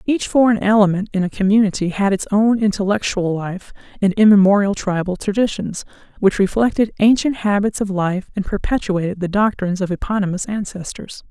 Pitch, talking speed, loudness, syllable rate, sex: 200 Hz, 150 wpm, -17 LUFS, 5.5 syllables/s, female